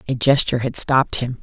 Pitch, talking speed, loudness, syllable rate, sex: 125 Hz, 210 wpm, -17 LUFS, 6.4 syllables/s, female